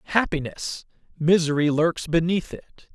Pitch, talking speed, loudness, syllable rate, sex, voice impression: 165 Hz, 80 wpm, -23 LUFS, 4.7 syllables/s, male, masculine, middle-aged, tensed, powerful, clear, intellectual, friendly, wild, lively, slightly intense